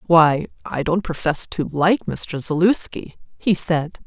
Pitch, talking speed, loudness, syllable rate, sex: 165 Hz, 150 wpm, -20 LUFS, 3.8 syllables/s, female